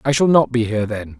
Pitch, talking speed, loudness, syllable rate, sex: 120 Hz, 300 wpm, -17 LUFS, 6.4 syllables/s, male